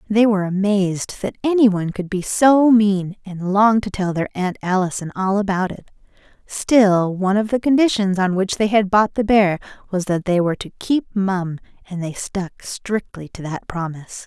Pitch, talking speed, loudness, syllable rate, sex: 195 Hz, 195 wpm, -19 LUFS, 5.0 syllables/s, female